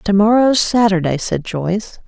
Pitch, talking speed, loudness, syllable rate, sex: 200 Hz, 145 wpm, -15 LUFS, 4.6 syllables/s, female